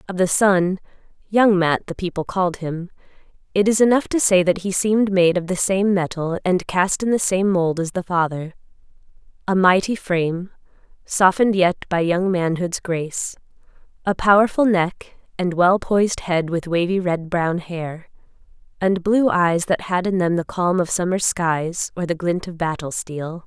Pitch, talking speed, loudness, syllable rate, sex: 180 Hz, 180 wpm, -20 LUFS, 4.6 syllables/s, female